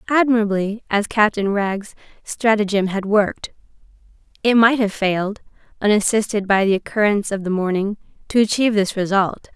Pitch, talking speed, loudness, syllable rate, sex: 210 Hz, 125 wpm, -19 LUFS, 5.6 syllables/s, female